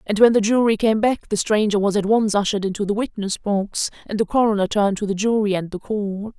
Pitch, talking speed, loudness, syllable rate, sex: 210 Hz, 245 wpm, -20 LUFS, 5.9 syllables/s, female